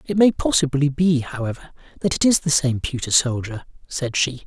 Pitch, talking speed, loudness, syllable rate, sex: 145 Hz, 190 wpm, -20 LUFS, 5.2 syllables/s, male